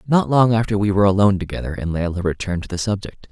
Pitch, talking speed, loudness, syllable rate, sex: 100 Hz, 235 wpm, -19 LUFS, 7.3 syllables/s, male